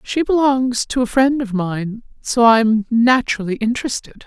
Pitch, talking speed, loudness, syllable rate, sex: 235 Hz, 170 wpm, -17 LUFS, 4.8 syllables/s, female